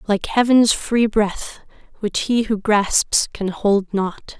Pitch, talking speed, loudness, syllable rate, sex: 210 Hz, 150 wpm, -18 LUFS, 3.1 syllables/s, female